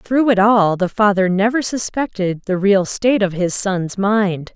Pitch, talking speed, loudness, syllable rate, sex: 200 Hz, 185 wpm, -17 LUFS, 4.2 syllables/s, female